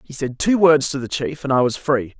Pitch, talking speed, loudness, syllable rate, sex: 140 Hz, 300 wpm, -19 LUFS, 5.3 syllables/s, male